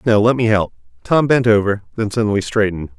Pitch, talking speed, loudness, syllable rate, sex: 105 Hz, 180 wpm, -16 LUFS, 6.4 syllables/s, male